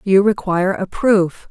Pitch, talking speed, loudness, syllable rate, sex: 195 Hz, 160 wpm, -16 LUFS, 4.3 syllables/s, female